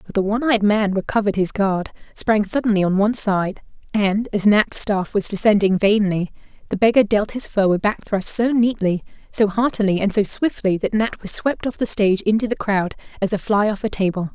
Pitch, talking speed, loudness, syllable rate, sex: 205 Hz, 215 wpm, -19 LUFS, 5.4 syllables/s, female